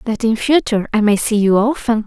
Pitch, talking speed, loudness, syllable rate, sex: 220 Hz, 230 wpm, -15 LUFS, 5.8 syllables/s, female